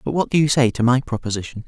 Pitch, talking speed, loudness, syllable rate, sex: 125 Hz, 285 wpm, -19 LUFS, 7.0 syllables/s, male